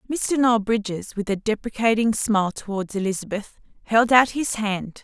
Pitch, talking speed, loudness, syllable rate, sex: 220 Hz, 155 wpm, -22 LUFS, 4.9 syllables/s, female